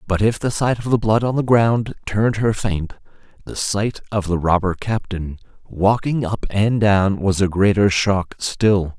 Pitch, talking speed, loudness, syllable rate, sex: 100 Hz, 185 wpm, -19 LUFS, 4.3 syllables/s, male